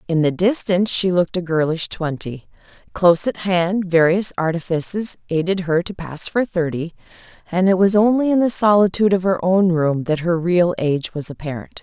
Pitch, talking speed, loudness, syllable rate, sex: 175 Hz, 185 wpm, -18 LUFS, 5.3 syllables/s, female